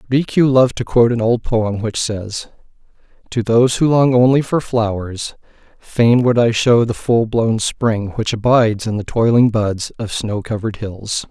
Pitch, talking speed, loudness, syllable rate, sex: 115 Hz, 180 wpm, -16 LUFS, 4.6 syllables/s, male